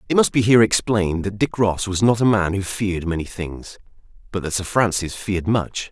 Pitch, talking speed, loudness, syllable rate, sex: 100 Hz, 225 wpm, -20 LUFS, 5.6 syllables/s, male